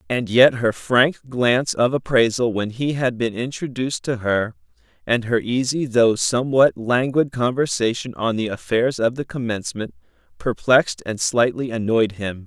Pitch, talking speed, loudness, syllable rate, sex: 120 Hz, 155 wpm, -20 LUFS, 4.7 syllables/s, male